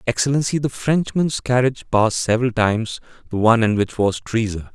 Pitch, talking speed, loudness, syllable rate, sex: 115 Hz, 165 wpm, -19 LUFS, 6.1 syllables/s, male